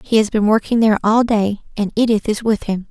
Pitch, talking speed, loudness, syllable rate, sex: 215 Hz, 250 wpm, -17 LUFS, 5.9 syllables/s, female